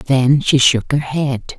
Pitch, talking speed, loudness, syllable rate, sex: 135 Hz, 190 wpm, -15 LUFS, 3.3 syllables/s, female